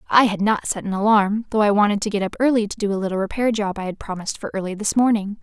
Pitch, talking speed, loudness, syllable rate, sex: 205 Hz, 290 wpm, -20 LUFS, 6.9 syllables/s, female